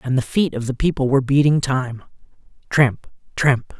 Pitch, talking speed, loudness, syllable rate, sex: 135 Hz, 160 wpm, -19 LUFS, 5.1 syllables/s, male